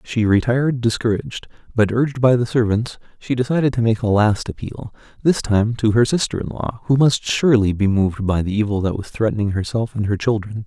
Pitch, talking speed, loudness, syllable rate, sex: 115 Hz, 210 wpm, -19 LUFS, 5.7 syllables/s, male